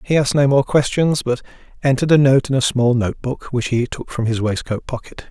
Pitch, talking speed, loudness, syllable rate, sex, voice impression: 130 Hz, 240 wpm, -18 LUFS, 5.8 syllables/s, male, masculine, adult-like, fluent, refreshing, sincere, slightly kind